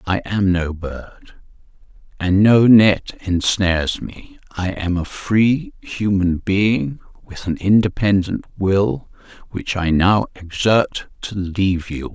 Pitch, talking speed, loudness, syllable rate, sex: 95 Hz, 130 wpm, -18 LUFS, 3.4 syllables/s, male